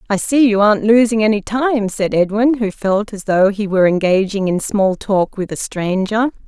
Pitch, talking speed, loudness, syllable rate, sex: 210 Hz, 205 wpm, -16 LUFS, 4.9 syllables/s, female